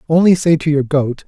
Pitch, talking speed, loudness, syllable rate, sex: 155 Hz, 235 wpm, -14 LUFS, 5.5 syllables/s, male